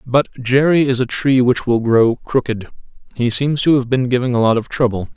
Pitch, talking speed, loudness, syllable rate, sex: 125 Hz, 220 wpm, -16 LUFS, 5.2 syllables/s, male